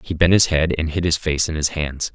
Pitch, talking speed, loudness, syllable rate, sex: 80 Hz, 310 wpm, -19 LUFS, 5.4 syllables/s, male